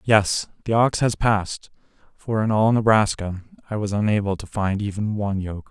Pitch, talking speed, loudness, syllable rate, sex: 105 Hz, 180 wpm, -22 LUFS, 5.0 syllables/s, male